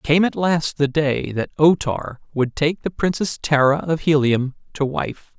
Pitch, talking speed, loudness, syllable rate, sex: 150 Hz, 190 wpm, -20 LUFS, 4.0 syllables/s, male